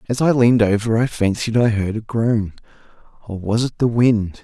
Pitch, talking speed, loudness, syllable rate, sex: 110 Hz, 190 wpm, -18 LUFS, 5.2 syllables/s, male